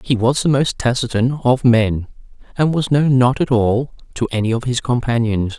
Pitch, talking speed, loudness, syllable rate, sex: 125 Hz, 195 wpm, -17 LUFS, 4.9 syllables/s, male